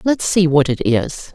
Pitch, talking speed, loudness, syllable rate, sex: 165 Hz, 220 wpm, -16 LUFS, 4.0 syllables/s, female